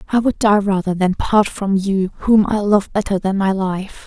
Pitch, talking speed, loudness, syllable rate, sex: 200 Hz, 220 wpm, -17 LUFS, 4.4 syllables/s, female